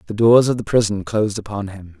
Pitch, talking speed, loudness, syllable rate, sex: 105 Hz, 240 wpm, -18 LUFS, 6.1 syllables/s, male